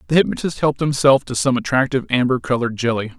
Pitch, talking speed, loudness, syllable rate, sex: 135 Hz, 190 wpm, -18 LUFS, 7.1 syllables/s, male